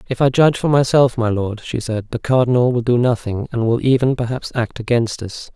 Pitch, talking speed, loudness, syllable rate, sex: 120 Hz, 225 wpm, -17 LUFS, 5.5 syllables/s, male